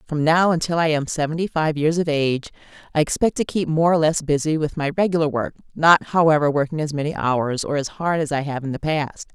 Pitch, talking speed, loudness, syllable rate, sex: 155 Hz, 235 wpm, -20 LUFS, 5.8 syllables/s, female